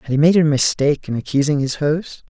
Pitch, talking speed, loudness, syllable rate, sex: 150 Hz, 235 wpm, -17 LUFS, 6.0 syllables/s, male